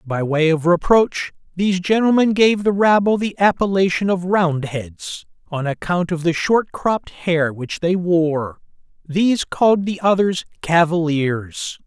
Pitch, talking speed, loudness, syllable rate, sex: 180 Hz, 140 wpm, -18 LUFS, 4.1 syllables/s, male